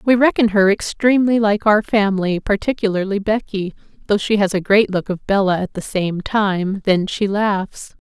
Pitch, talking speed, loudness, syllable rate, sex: 205 Hz, 180 wpm, -17 LUFS, 4.8 syllables/s, female